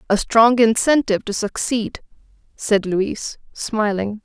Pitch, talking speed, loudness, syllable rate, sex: 215 Hz, 115 wpm, -18 LUFS, 4.1 syllables/s, female